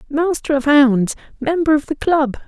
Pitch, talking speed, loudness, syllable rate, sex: 290 Hz, 170 wpm, -16 LUFS, 4.5 syllables/s, female